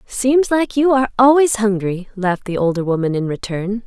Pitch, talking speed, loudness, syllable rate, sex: 220 Hz, 185 wpm, -17 LUFS, 5.3 syllables/s, female